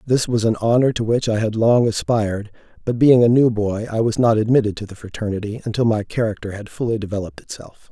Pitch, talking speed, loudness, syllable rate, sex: 110 Hz, 220 wpm, -19 LUFS, 6.1 syllables/s, male